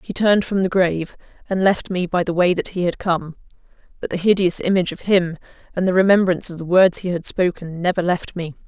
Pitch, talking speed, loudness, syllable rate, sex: 180 Hz, 230 wpm, -19 LUFS, 6.0 syllables/s, female